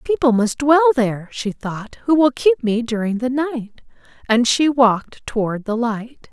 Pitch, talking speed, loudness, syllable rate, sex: 245 Hz, 180 wpm, -18 LUFS, 4.4 syllables/s, female